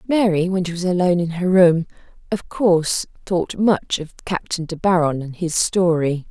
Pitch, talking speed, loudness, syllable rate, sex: 175 Hz, 180 wpm, -19 LUFS, 4.8 syllables/s, female